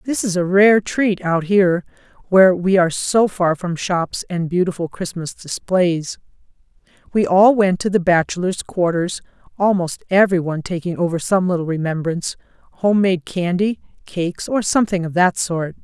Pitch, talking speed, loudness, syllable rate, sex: 180 Hz, 150 wpm, -18 LUFS, 5.1 syllables/s, female